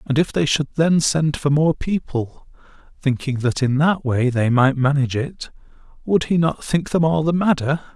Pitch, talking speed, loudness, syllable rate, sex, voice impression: 145 Hz, 195 wpm, -19 LUFS, 4.7 syllables/s, male, very masculine, very adult-like, old, thick, slightly relaxed, slightly weak, slightly dark, very soft, muffled, slightly fluent, slightly raspy, cool, intellectual, slightly refreshing, sincere, very calm, very mature, friendly, reassuring, unique, slightly elegant, wild, slightly sweet, slightly lively, kind, slightly intense, slightly modest